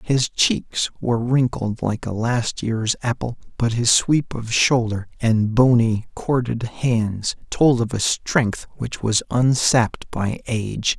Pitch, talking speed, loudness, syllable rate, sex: 115 Hz, 145 wpm, -20 LUFS, 3.7 syllables/s, male